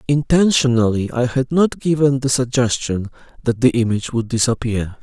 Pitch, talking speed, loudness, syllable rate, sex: 125 Hz, 145 wpm, -18 LUFS, 5.1 syllables/s, male